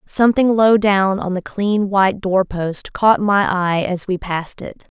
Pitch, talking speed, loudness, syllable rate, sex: 195 Hz, 190 wpm, -17 LUFS, 4.2 syllables/s, female